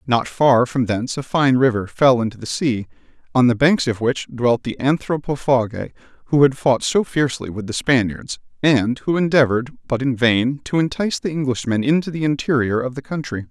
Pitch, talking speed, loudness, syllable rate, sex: 130 Hz, 190 wpm, -19 LUFS, 5.3 syllables/s, male